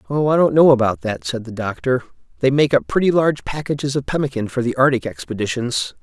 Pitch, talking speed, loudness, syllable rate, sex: 135 Hz, 210 wpm, -18 LUFS, 6.1 syllables/s, male